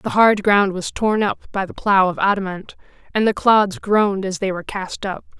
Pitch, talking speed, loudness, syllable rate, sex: 200 Hz, 220 wpm, -18 LUFS, 5.1 syllables/s, female